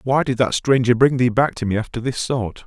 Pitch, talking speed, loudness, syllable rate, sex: 125 Hz, 270 wpm, -19 LUFS, 5.5 syllables/s, male